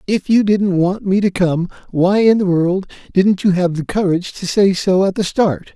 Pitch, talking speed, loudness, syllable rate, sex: 185 Hz, 230 wpm, -16 LUFS, 4.7 syllables/s, male